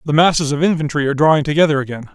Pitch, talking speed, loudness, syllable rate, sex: 150 Hz, 225 wpm, -15 LUFS, 8.2 syllables/s, male